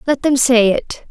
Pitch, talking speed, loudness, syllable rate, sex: 250 Hz, 215 wpm, -14 LUFS, 4.2 syllables/s, female